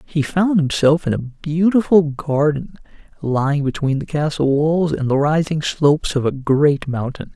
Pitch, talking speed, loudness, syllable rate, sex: 150 Hz, 165 wpm, -18 LUFS, 4.4 syllables/s, male